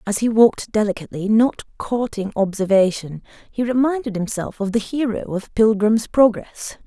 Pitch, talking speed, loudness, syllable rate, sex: 215 Hz, 140 wpm, -19 LUFS, 4.9 syllables/s, female